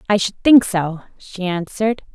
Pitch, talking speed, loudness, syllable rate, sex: 200 Hz, 170 wpm, -17 LUFS, 4.6 syllables/s, female